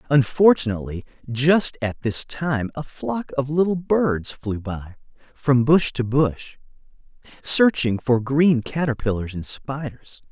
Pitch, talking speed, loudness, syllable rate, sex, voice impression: 135 Hz, 130 wpm, -21 LUFS, 3.9 syllables/s, male, masculine, adult-like, clear, refreshing, slightly sincere